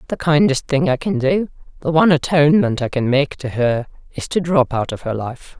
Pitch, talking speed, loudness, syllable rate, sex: 150 Hz, 205 wpm, -17 LUFS, 5.4 syllables/s, female